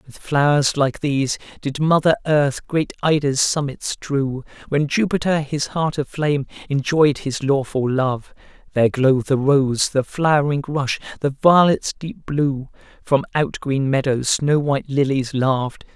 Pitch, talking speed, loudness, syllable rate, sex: 140 Hz, 145 wpm, -19 LUFS, 4.3 syllables/s, male